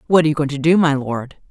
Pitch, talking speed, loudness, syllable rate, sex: 150 Hz, 320 wpm, -17 LUFS, 7.0 syllables/s, female